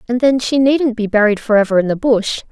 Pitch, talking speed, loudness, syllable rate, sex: 235 Hz, 265 wpm, -14 LUFS, 5.7 syllables/s, female